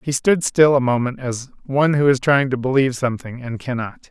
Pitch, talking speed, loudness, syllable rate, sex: 130 Hz, 220 wpm, -19 LUFS, 5.7 syllables/s, male